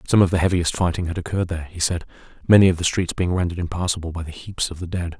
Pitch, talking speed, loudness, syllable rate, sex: 85 Hz, 265 wpm, -21 LUFS, 7.5 syllables/s, male